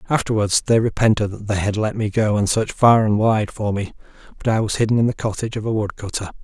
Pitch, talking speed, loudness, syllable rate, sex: 105 Hz, 245 wpm, -19 LUFS, 6.4 syllables/s, male